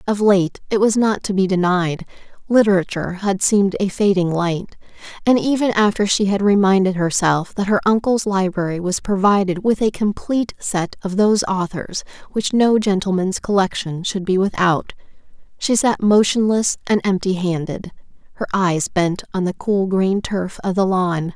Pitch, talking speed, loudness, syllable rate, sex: 195 Hz, 165 wpm, -18 LUFS, 4.8 syllables/s, female